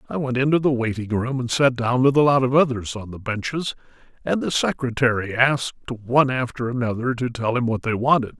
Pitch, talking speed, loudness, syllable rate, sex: 125 Hz, 215 wpm, -21 LUFS, 5.6 syllables/s, male